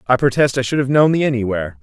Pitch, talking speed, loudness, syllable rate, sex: 125 Hz, 260 wpm, -16 LUFS, 7.2 syllables/s, male